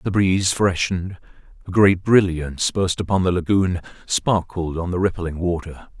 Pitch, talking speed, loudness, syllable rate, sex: 90 Hz, 150 wpm, -20 LUFS, 4.9 syllables/s, male